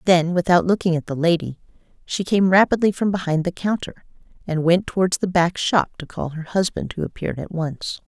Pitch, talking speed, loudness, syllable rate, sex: 175 Hz, 200 wpm, -21 LUFS, 5.5 syllables/s, female